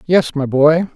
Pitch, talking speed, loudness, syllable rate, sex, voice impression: 155 Hz, 190 wpm, -14 LUFS, 3.6 syllables/s, male, very masculine, old, thick, slightly tensed, powerful, slightly bright, slightly hard, clear, slightly halting, slightly raspy, cool, intellectual, refreshing, sincere, slightly calm, friendly, reassuring, slightly unique, slightly elegant, wild, slightly sweet, lively, strict, slightly intense